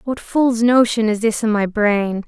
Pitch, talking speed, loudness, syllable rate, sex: 220 Hz, 210 wpm, -17 LUFS, 4.2 syllables/s, female